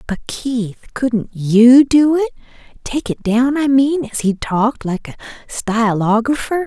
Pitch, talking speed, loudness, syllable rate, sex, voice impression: 240 Hz, 145 wpm, -16 LUFS, 4.1 syllables/s, female, very feminine, slightly middle-aged, thin, tensed, slightly weak, bright, slightly soft, slightly muffled, fluent, slightly raspy, cute, slightly cool, intellectual, refreshing, sincere, calm, friendly, reassuring, unique, elegant, wild, slightly sweet, lively, kind, slightly intense, slightly modest